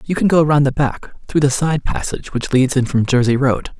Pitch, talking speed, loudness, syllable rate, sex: 135 Hz, 255 wpm, -16 LUFS, 5.5 syllables/s, male